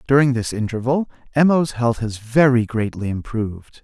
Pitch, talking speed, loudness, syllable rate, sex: 120 Hz, 155 wpm, -19 LUFS, 4.9 syllables/s, male